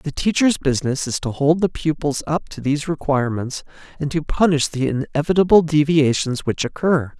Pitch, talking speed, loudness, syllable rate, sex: 150 Hz, 165 wpm, -19 LUFS, 5.4 syllables/s, male